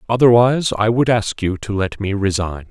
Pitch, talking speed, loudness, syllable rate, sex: 110 Hz, 200 wpm, -17 LUFS, 5.3 syllables/s, male